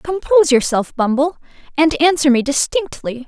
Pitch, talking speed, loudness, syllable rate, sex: 280 Hz, 130 wpm, -16 LUFS, 5.0 syllables/s, female